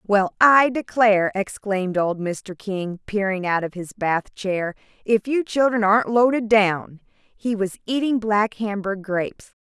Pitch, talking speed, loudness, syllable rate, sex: 205 Hz, 155 wpm, -21 LUFS, 4.1 syllables/s, female